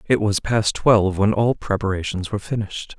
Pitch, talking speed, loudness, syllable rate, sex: 105 Hz, 180 wpm, -20 LUFS, 5.6 syllables/s, male